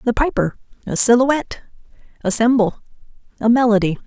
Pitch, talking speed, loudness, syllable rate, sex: 230 Hz, 75 wpm, -17 LUFS, 5.8 syllables/s, female